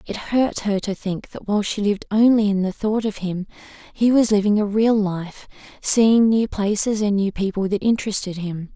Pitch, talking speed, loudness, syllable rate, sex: 205 Hz, 205 wpm, -20 LUFS, 5.0 syllables/s, female